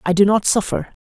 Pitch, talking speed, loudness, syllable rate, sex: 195 Hz, 235 wpm, -17 LUFS, 5.8 syllables/s, female